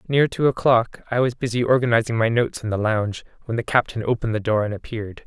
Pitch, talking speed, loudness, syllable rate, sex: 115 Hz, 230 wpm, -21 LUFS, 6.7 syllables/s, male